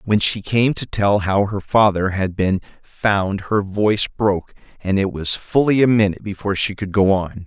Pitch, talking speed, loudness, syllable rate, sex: 100 Hz, 200 wpm, -18 LUFS, 4.9 syllables/s, male